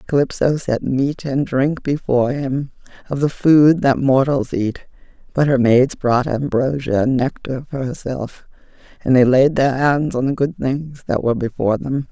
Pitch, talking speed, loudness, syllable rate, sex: 135 Hz, 175 wpm, -18 LUFS, 4.5 syllables/s, female